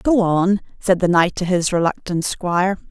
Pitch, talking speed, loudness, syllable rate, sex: 185 Hz, 185 wpm, -18 LUFS, 4.6 syllables/s, female